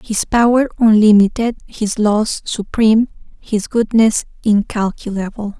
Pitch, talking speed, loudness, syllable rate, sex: 215 Hz, 95 wpm, -15 LUFS, 4.1 syllables/s, female